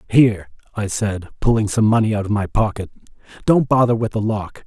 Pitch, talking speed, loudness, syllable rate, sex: 110 Hz, 195 wpm, -18 LUFS, 5.6 syllables/s, male